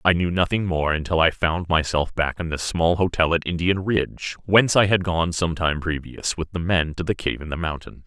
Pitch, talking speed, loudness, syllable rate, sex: 85 Hz, 240 wpm, -22 LUFS, 5.2 syllables/s, male